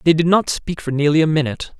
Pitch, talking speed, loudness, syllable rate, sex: 155 Hz, 265 wpm, -17 LUFS, 6.6 syllables/s, male